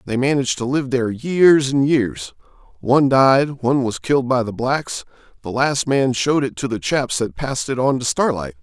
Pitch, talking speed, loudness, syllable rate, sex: 125 Hz, 210 wpm, -18 LUFS, 5.2 syllables/s, male